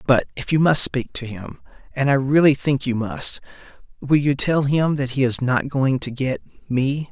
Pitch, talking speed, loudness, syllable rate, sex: 135 Hz, 175 wpm, -20 LUFS, 4.4 syllables/s, male